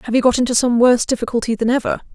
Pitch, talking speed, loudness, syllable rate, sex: 240 Hz, 250 wpm, -16 LUFS, 8.0 syllables/s, female